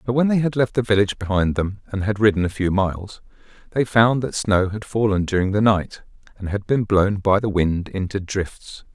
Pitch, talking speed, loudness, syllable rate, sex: 105 Hz, 220 wpm, -20 LUFS, 5.2 syllables/s, male